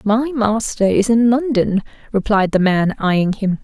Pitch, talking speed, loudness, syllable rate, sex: 215 Hz, 165 wpm, -16 LUFS, 4.1 syllables/s, female